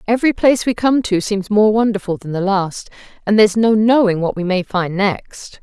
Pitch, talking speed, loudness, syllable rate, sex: 205 Hz, 215 wpm, -16 LUFS, 5.3 syllables/s, female